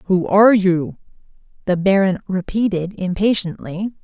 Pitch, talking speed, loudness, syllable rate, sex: 190 Hz, 105 wpm, -17 LUFS, 4.4 syllables/s, female